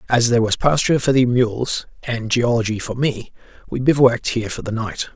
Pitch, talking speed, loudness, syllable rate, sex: 120 Hz, 200 wpm, -19 LUFS, 5.6 syllables/s, male